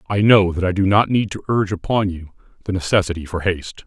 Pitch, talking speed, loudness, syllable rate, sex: 95 Hz, 235 wpm, -18 LUFS, 6.3 syllables/s, male